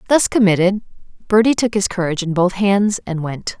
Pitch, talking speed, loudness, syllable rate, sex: 195 Hz, 185 wpm, -17 LUFS, 5.6 syllables/s, female